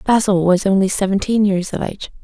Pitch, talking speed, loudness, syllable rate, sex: 195 Hz, 190 wpm, -17 LUFS, 5.9 syllables/s, female